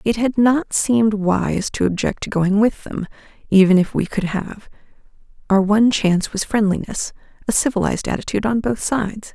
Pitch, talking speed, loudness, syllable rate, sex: 210 Hz, 165 wpm, -18 LUFS, 5.3 syllables/s, female